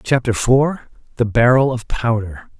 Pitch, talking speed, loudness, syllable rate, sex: 120 Hz, 115 wpm, -17 LUFS, 4.2 syllables/s, male